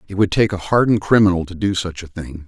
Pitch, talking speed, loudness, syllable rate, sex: 95 Hz, 265 wpm, -17 LUFS, 6.6 syllables/s, male